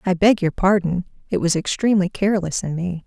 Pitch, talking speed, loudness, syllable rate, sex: 185 Hz, 195 wpm, -20 LUFS, 5.9 syllables/s, female